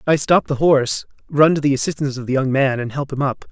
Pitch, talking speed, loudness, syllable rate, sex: 140 Hz, 275 wpm, -18 LUFS, 6.4 syllables/s, male